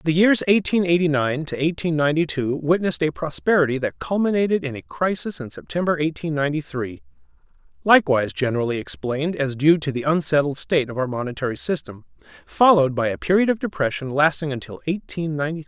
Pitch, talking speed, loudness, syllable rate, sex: 145 Hz, 175 wpm, -21 LUFS, 4.6 syllables/s, male